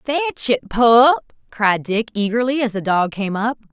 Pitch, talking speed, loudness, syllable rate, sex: 230 Hz, 175 wpm, -18 LUFS, 4.1 syllables/s, female